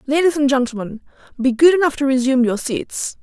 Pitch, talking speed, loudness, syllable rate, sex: 270 Hz, 185 wpm, -17 LUFS, 5.9 syllables/s, female